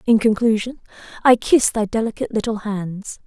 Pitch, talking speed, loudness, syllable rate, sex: 220 Hz, 145 wpm, -19 LUFS, 5.2 syllables/s, female